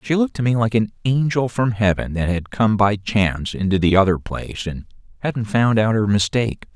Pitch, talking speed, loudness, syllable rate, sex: 105 Hz, 215 wpm, -19 LUFS, 5.5 syllables/s, male